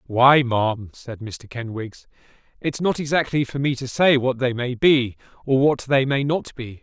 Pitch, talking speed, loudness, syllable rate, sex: 130 Hz, 195 wpm, -21 LUFS, 4.4 syllables/s, male